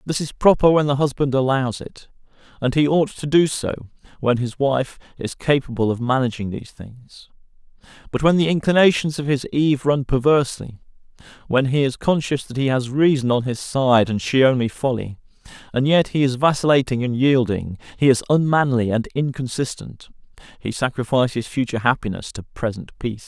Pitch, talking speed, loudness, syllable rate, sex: 130 Hz, 170 wpm, -20 LUFS, 5.3 syllables/s, male